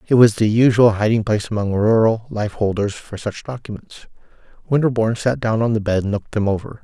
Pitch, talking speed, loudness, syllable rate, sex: 110 Hz, 195 wpm, -18 LUFS, 6.2 syllables/s, male